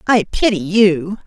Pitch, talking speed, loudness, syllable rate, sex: 195 Hz, 145 wpm, -15 LUFS, 4.0 syllables/s, female